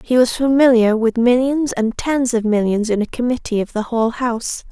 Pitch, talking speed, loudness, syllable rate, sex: 240 Hz, 205 wpm, -17 LUFS, 5.2 syllables/s, female